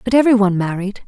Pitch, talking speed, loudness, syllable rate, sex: 210 Hz, 225 wpm, -16 LUFS, 8.5 syllables/s, female